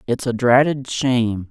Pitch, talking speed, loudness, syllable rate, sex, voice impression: 125 Hz, 160 wpm, -18 LUFS, 4.4 syllables/s, male, very masculine, very adult-like, very middle-aged, very thick, tensed, very powerful, slightly dark, very hard, clear, fluent, cool, very intellectual, sincere, very calm, slightly friendly, slightly reassuring, unique, elegant, slightly wild, slightly sweet, kind, modest